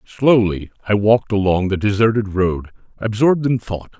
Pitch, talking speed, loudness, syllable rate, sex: 105 Hz, 150 wpm, -17 LUFS, 5.4 syllables/s, male